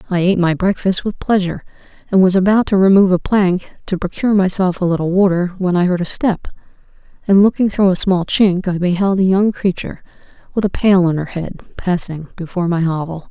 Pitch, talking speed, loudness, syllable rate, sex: 185 Hz, 205 wpm, -16 LUFS, 6.0 syllables/s, female